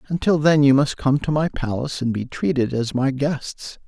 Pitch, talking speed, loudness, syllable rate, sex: 140 Hz, 215 wpm, -20 LUFS, 5.0 syllables/s, male